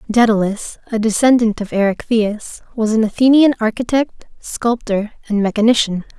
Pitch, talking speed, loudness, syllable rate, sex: 225 Hz, 115 wpm, -16 LUFS, 4.9 syllables/s, female